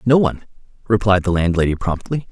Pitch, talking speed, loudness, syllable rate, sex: 100 Hz, 155 wpm, -18 LUFS, 6.1 syllables/s, male